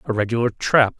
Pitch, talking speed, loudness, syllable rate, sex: 115 Hz, 180 wpm, -19 LUFS, 5.8 syllables/s, male